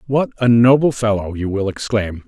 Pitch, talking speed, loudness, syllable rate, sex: 115 Hz, 185 wpm, -16 LUFS, 5.0 syllables/s, male